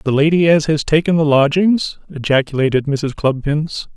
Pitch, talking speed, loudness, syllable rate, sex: 150 Hz, 150 wpm, -15 LUFS, 4.8 syllables/s, male